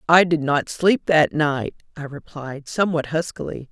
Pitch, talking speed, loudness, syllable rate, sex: 155 Hz, 160 wpm, -20 LUFS, 4.6 syllables/s, female